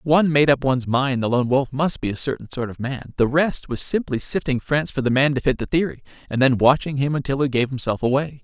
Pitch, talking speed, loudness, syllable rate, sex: 135 Hz, 265 wpm, -21 LUFS, 6.0 syllables/s, male